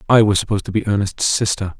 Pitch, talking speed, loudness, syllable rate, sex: 100 Hz, 235 wpm, -18 LUFS, 6.9 syllables/s, male